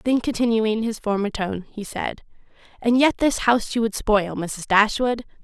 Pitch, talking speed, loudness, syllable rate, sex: 220 Hz, 175 wpm, -22 LUFS, 4.7 syllables/s, female